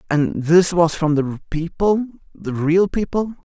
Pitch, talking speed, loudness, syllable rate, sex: 170 Hz, 155 wpm, -19 LUFS, 3.9 syllables/s, male